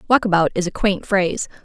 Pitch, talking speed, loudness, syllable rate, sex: 190 Hz, 220 wpm, -19 LUFS, 6.2 syllables/s, female